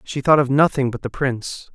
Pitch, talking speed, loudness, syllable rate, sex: 135 Hz, 240 wpm, -19 LUFS, 5.6 syllables/s, male